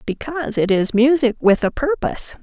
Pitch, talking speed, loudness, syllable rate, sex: 250 Hz, 175 wpm, -18 LUFS, 5.4 syllables/s, female